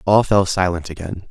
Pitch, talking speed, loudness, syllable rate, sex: 90 Hz, 185 wpm, -18 LUFS, 5.0 syllables/s, male